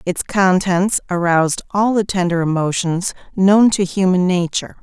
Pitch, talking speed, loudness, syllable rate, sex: 185 Hz, 135 wpm, -16 LUFS, 4.7 syllables/s, female